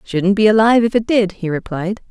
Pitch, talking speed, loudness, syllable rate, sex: 205 Hz, 230 wpm, -15 LUFS, 5.6 syllables/s, female